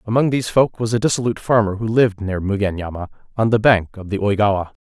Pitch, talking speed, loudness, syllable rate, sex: 105 Hz, 210 wpm, -18 LUFS, 6.7 syllables/s, male